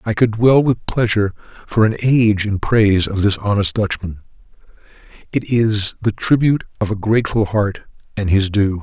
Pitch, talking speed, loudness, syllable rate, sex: 105 Hz, 170 wpm, -17 LUFS, 5.3 syllables/s, male